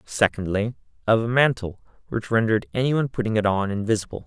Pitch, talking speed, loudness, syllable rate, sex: 110 Hz, 170 wpm, -23 LUFS, 6.6 syllables/s, male